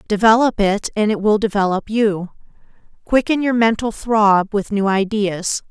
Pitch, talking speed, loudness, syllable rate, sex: 210 Hz, 145 wpm, -17 LUFS, 4.4 syllables/s, female